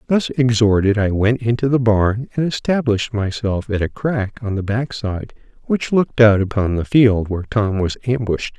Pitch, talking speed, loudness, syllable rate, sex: 110 Hz, 190 wpm, -18 LUFS, 4.9 syllables/s, male